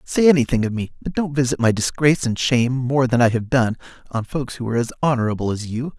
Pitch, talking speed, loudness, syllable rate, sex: 125 Hz, 240 wpm, -20 LUFS, 6.3 syllables/s, male